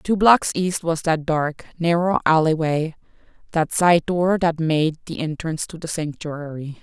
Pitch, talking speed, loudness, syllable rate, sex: 165 Hz, 160 wpm, -21 LUFS, 4.3 syllables/s, female